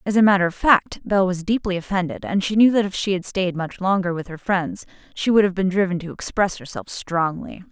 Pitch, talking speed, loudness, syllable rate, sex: 185 Hz, 240 wpm, -21 LUFS, 5.6 syllables/s, female